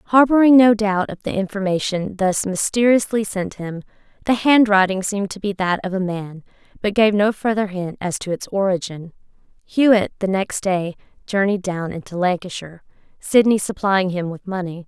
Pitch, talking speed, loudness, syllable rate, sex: 195 Hz, 155 wpm, -19 LUFS, 5.0 syllables/s, female